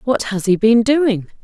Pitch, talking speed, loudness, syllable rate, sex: 225 Hz, 210 wpm, -15 LUFS, 4.1 syllables/s, female